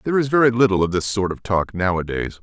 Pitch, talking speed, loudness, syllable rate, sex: 105 Hz, 295 wpm, -19 LUFS, 6.5 syllables/s, male